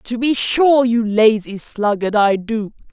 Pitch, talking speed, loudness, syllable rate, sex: 225 Hz, 165 wpm, -16 LUFS, 3.7 syllables/s, female